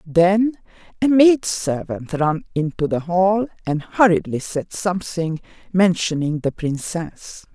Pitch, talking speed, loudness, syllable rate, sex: 180 Hz, 110 wpm, -20 LUFS, 3.7 syllables/s, female